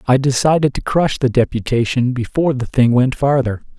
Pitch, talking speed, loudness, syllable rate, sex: 130 Hz, 175 wpm, -16 LUFS, 5.4 syllables/s, male